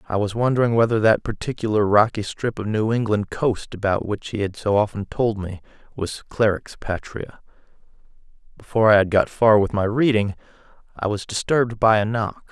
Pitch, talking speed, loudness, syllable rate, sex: 105 Hz, 175 wpm, -21 LUFS, 5.3 syllables/s, male